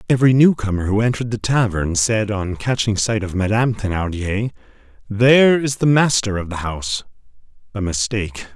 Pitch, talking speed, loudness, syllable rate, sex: 110 Hz, 160 wpm, -18 LUFS, 5.5 syllables/s, male